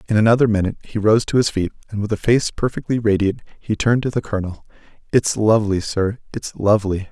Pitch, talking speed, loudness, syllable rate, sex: 105 Hz, 200 wpm, -19 LUFS, 6.5 syllables/s, male